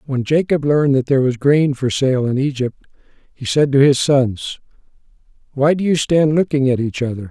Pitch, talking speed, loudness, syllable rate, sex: 140 Hz, 195 wpm, -16 LUFS, 5.2 syllables/s, male